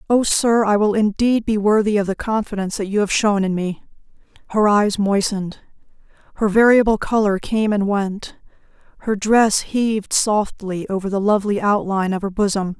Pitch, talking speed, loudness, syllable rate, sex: 205 Hz, 170 wpm, -18 LUFS, 5.2 syllables/s, female